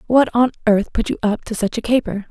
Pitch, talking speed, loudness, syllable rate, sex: 225 Hz, 260 wpm, -18 LUFS, 5.9 syllables/s, female